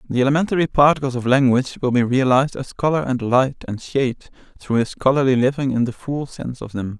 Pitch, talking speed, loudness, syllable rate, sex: 130 Hz, 205 wpm, -19 LUFS, 6.1 syllables/s, male